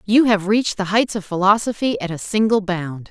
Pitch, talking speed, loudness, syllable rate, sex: 200 Hz, 215 wpm, -19 LUFS, 5.4 syllables/s, female